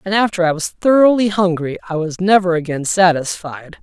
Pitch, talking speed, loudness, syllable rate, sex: 180 Hz, 175 wpm, -16 LUFS, 5.3 syllables/s, male